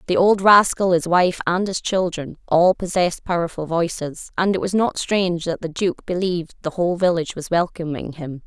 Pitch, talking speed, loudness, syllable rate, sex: 175 Hz, 190 wpm, -20 LUFS, 5.3 syllables/s, female